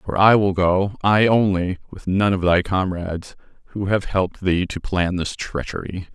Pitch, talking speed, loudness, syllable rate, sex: 95 Hz, 185 wpm, -20 LUFS, 4.6 syllables/s, male